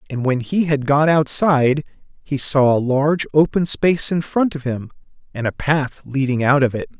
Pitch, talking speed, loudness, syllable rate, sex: 145 Hz, 195 wpm, -18 LUFS, 5.0 syllables/s, male